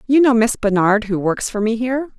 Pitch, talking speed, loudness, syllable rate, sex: 230 Hz, 245 wpm, -17 LUFS, 5.6 syllables/s, female